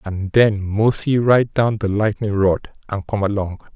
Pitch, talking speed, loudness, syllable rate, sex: 105 Hz, 175 wpm, -19 LUFS, 4.1 syllables/s, male